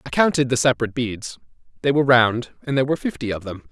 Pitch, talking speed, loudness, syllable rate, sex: 125 Hz, 210 wpm, -20 LUFS, 7.3 syllables/s, male